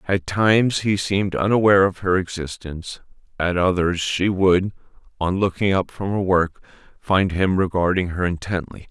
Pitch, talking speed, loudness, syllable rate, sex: 95 Hz, 155 wpm, -20 LUFS, 4.9 syllables/s, male